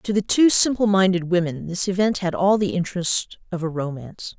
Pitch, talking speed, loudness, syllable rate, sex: 185 Hz, 205 wpm, -20 LUFS, 5.4 syllables/s, female